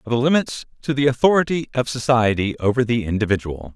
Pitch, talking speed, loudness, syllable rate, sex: 120 Hz, 175 wpm, -19 LUFS, 6.2 syllables/s, male